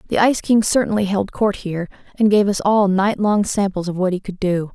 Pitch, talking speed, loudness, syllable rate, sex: 200 Hz, 240 wpm, -18 LUFS, 5.7 syllables/s, female